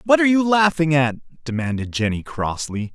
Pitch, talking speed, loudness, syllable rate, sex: 145 Hz, 165 wpm, -20 LUFS, 5.0 syllables/s, male